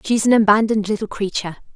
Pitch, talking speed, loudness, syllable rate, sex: 210 Hz, 205 wpm, -18 LUFS, 8.1 syllables/s, female